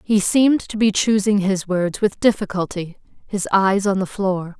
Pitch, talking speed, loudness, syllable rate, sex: 195 Hz, 185 wpm, -19 LUFS, 4.6 syllables/s, female